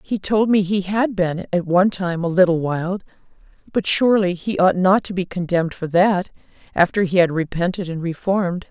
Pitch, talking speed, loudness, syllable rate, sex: 185 Hz, 195 wpm, -19 LUFS, 5.2 syllables/s, female